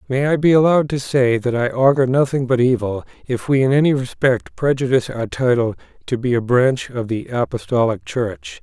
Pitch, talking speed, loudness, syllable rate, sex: 125 Hz, 195 wpm, -18 LUFS, 5.3 syllables/s, male